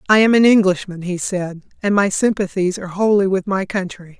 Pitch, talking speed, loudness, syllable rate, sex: 190 Hz, 200 wpm, -17 LUFS, 5.5 syllables/s, female